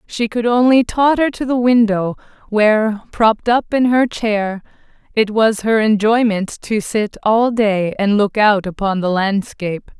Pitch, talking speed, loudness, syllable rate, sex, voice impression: 220 Hz, 160 wpm, -16 LUFS, 4.2 syllables/s, female, feminine, slightly young, adult-like, thin, tensed, slightly powerful, bright, hard, clear, fluent, cute, intellectual, slightly refreshing, calm, slightly friendly, reassuring, slightly wild, kind